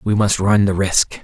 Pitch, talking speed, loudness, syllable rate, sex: 100 Hz, 245 wpm, -16 LUFS, 4.4 syllables/s, male